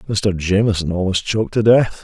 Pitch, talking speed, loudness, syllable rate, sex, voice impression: 100 Hz, 175 wpm, -17 LUFS, 5.5 syllables/s, male, very masculine, middle-aged, thick, slightly muffled, cool, slightly calm, wild